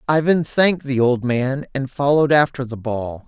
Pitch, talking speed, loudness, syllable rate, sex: 135 Hz, 185 wpm, -19 LUFS, 4.9 syllables/s, male